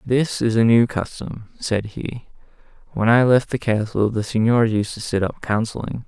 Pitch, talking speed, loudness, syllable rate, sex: 115 Hz, 190 wpm, -20 LUFS, 4.6 syllables/s, male